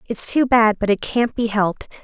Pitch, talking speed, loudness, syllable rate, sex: 225 Hz, 235 wpm, -18 LUFS, 4.9 syllables/s, female